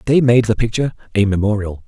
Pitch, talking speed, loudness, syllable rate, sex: 110 Hz, 190 wpm, -17 LUFS, 6.6 syllables/s, male